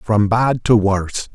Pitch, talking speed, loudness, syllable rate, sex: 110 Hz, 180 wpm, -16 LUFS, 3.9 syllables/s, male